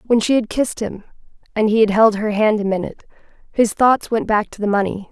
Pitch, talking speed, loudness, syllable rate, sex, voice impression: 215 Hz, 235 wpm, -18 LUFS, 6.0 syllables/s, female, very feminine, slightly young, thin, tensed, slightly powerful, bright, slightly soft, clear, fluent, slightly cool, slightly intellectual, refreshing, slightly sincere, slightly calm, friendly, reassuring, unique, slightly elegant, wild, lively, strict, slightly intense, sharp